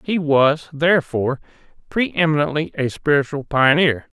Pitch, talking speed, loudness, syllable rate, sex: 150 Hz, 115 wpm, -18 LUFS, 4.9 syllables/s, male